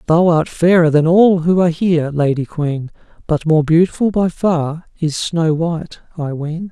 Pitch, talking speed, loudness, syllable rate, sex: 165 Hz, 180 wpm, -15 LUFS, 4.6 syllables/s, male